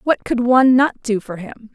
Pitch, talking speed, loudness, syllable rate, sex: 240 Hz, 240 wpm, -16 LUFS, 5.6 syllables/s, female